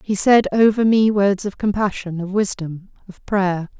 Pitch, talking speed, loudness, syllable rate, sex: 200 Hz, 175 wpm, -18 LUFS, 4.4 syllables/s, female